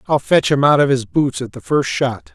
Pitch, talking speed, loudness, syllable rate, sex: 135 Hz, 280 wpm, -16 LUFS, 4.9 syllables/s, male